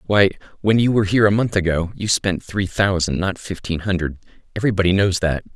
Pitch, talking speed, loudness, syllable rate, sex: 95 Hz, 195 wpm, -19 LUFS, 6.1 syllables/s, male